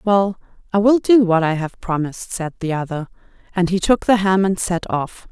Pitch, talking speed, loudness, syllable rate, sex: 185 Hz, 215 wpm, -18 LUFS, 5.1 syllables/s, female